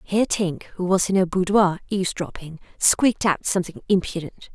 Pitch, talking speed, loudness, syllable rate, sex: 185 Hz, 160 wpm, -22 LUFS, 5.4 syllables/s, female